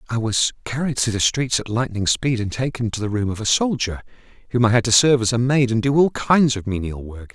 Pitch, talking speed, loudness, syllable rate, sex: 120 Hz, 260 wpm, -19 LUFS, 5.8 syllables/s, male